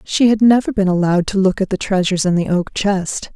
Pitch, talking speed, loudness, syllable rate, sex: 190 Hz, 250 wpm, -16 LUFS, 5.9 syllables/s, female